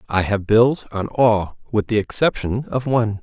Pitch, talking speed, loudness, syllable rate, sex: 110 Hz, 185 wpm, -19 LUFS, 4.6 syllables/s, male